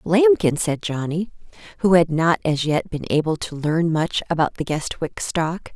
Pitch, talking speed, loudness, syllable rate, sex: 165 Hz, 175 wpm, -21 LUFS, 4.5 syllables/s, female